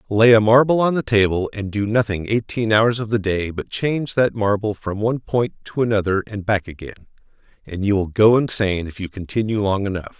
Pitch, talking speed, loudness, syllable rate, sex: 105 Hz, 210 wpm, -19 LUFS, 5.6 syllables/s, male